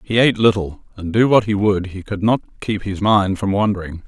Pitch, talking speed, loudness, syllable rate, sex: 100 Hz, 235 wpm, -18 LUFS, 5.5 syllables/s, male